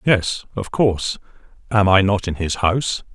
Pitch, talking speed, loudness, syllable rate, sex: 100 Hz, 170 wpm, -19 LUFS, 4.7 syllables/s, male